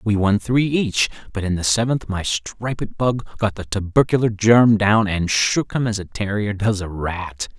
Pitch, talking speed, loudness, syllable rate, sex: 105 Hz, 200 wpm, -20 LUFS, 4.3 syllables/s, male